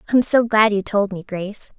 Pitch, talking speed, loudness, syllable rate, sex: 210 Hz, 270 wpm, -18 LUFS, 6.3 syllables/s, female